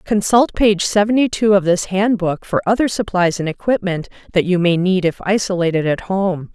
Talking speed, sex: 185 wpm, female